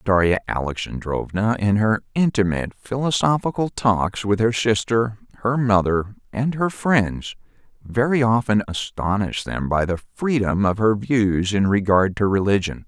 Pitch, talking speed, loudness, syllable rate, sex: 105 Hz, 135 wpm, -21 LUFS, 4.5 syllables/s, male